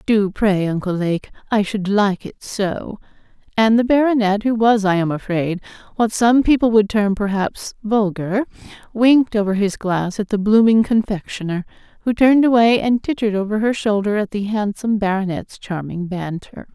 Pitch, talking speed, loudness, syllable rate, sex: 210 Hz, 165 wpm, -18 LUFS, 4.9 syllables/s, female